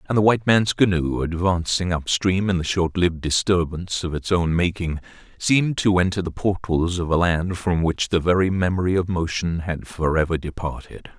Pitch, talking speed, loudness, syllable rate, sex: 90 Hz, 175 wpm, -21 LUFS, 5.2 syllables/s, male